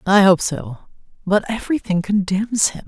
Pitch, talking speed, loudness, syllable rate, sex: 195 Hz, 145 wpm, -18 LUFS, 4.9 syllables/s, female